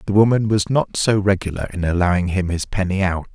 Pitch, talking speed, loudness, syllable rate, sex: 95 Hz, 215 wpm, -19 LUFS, 5.7 syllables/s, male